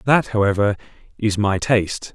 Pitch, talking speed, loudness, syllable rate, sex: 105 Hz, 110 wpm, -19 LUFS, 5.2 syllables/s, male